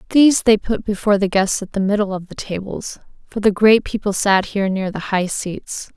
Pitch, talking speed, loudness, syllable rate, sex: 200 Hz, 220 wpm, -18 LUFS, 5.4 syllables/s, female